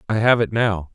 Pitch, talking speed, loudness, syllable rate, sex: 105 Hz, 255 wpm, -19 LUFS, 5.3 syllables/s, male